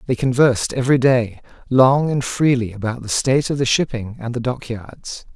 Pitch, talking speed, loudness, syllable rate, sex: 125 Hz, 190 wpm, -18 LUFS, 5.2 syllables/s, male